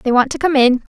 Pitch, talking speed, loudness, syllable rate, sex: 265 Hz, 315 wpm, -15 LUFS, 6.1 syllables/s, female